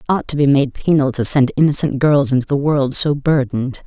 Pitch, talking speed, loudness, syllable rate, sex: 140 Hz, 235 wpm, -16 LUFS, 5.6 syllables/s, female